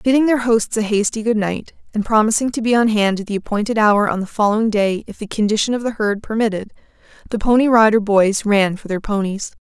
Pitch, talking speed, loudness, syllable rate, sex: 215 Hz, 225 wpm, -17 LUFS, 5.9 syllables/s, female